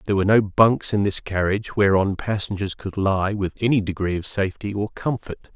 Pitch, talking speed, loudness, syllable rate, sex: 100 Hz, 195 wpm, -22 LUFS, 5.7 syllables/s, male